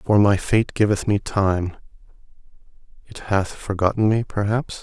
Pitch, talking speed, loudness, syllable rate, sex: 100 Hz, 135 wpm, -21 LUFS, 4.2 syllables/s, male